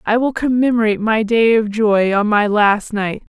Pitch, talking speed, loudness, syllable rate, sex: 220 Hz, 195 wpm, -15 LUFS, 4.8 syllables/s, female